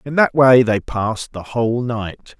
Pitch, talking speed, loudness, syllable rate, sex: 120 Hz, 200 wpm, -17 LUFS, 4.4 syllables/s, male